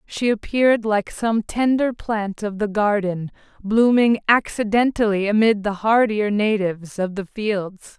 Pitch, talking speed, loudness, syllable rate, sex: 215 Hz, 135 wpm, -20 LUFS, 4.1 syllables/s, female